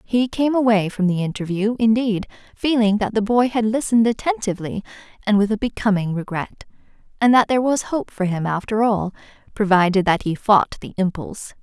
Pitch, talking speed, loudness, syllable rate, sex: 210 Hz, 175 wpm, -20 LUFS, 5.6 syllables/s, female